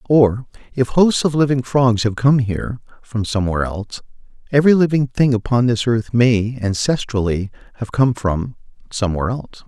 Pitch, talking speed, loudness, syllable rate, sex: 120 Hz, 135 wpm, -18 LUFS, 5.3 syllables/s, male